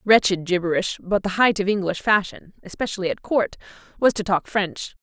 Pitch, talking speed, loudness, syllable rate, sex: 195 Hz, 180 wpm, -22 LUFS, 5.3 syllables/s, female